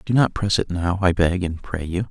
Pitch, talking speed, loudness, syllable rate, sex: 95 Hz, 285 wpm, -21 LUFS, 5.1 syllables/s, male